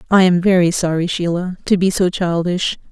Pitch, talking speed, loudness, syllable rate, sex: 180 Hz, 185 wpm, -16 LUFS, 5.1 syllables/s, female